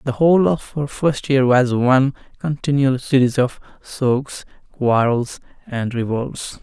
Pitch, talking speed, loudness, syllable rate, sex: 130 Hz, 135 wpm, -18 LUFS, 4.0 syllables/s, male